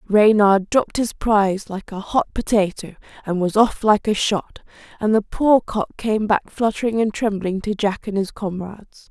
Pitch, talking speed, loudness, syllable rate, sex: 210 Hz, 180 wpm, -20 LUFS, 4.5 syllables/s, female